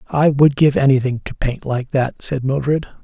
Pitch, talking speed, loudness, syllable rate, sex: 135 Hz, 195 wpm, -17 LUFS, 4.8 syllables/s, male